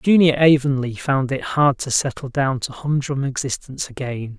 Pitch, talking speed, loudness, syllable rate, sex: 135 Hz, 165 wpm, -20 LUFS, 4.8 syllables/s, male